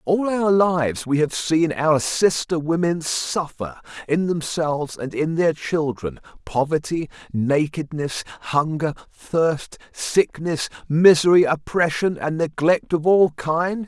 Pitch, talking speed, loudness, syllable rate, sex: 160 Hz, 120 wpm, -21 LUFS, 3.8 syllables/s, male